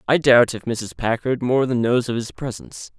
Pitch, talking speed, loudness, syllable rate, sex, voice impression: 120 Hz, 220 wpm, -20 LUFS, 5.0 syllables/s, male, masculine, adult-like, tensed, powerful, slightly dark, hard, fluent, cool, calm, wild, lively, slightly strict, slightly intense, slightly sharp